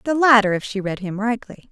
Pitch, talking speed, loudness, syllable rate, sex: 220 Hz, 245 wpm, -19 LUFS, 5.7 syllables/s, female